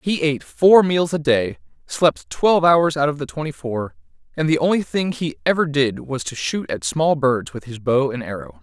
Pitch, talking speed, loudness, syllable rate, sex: 150 Hz, 225 wpm, -19 LUFS, 4.9 syllables/s, male